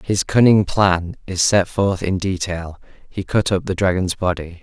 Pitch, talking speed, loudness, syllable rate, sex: 95 Hz, 180 wpm, -18 LUFS, 4.3 syllables/s, male